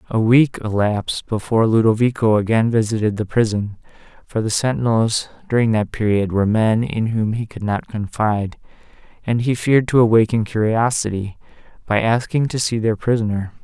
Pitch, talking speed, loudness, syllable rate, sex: 110 Hz, 155 wpm, -18 LUFS, 5.4 syllables/s, male